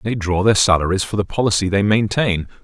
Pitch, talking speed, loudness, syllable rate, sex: 100 Hz, 205 wpm, -17 LUFS, 5.8 syllables/s, male